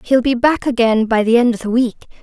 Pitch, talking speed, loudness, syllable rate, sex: 240 Hz, 270 wpm, -15 LUFS, 5.9 syllables/s, female